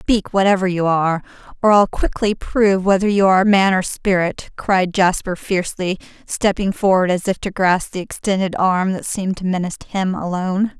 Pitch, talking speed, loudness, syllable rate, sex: 190 Hz, 180 wpm, -18 LUFS, 5.3 syllables/s, female